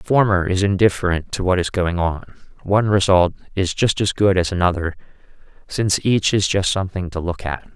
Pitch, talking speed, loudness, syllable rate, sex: 95 Hz, 195 wpm, -19 LUFS, 5.5 syllables/s, male